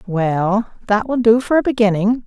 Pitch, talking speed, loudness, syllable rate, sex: 220 Hz, 185 wpm, -16 LUFS, 4.6 syllables/s, female